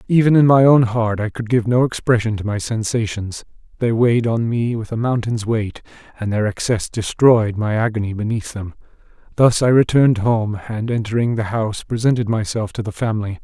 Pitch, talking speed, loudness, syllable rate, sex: 115 Hz, 185 wpm, -18 LUFS, 5.4 syllables/s, male